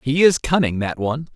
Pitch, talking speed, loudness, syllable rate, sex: 135 Hz, 220 wpm, -19 LUFS, 5.8 syllables/s, male